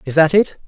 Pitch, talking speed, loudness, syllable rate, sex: 165 Hz, 265 wpm, -15 LUFS, 5.9 syllables/s, male